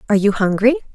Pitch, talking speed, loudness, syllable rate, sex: 225 Hz, 190 wpm, -16 LUFS, 8.3 syllables/s, female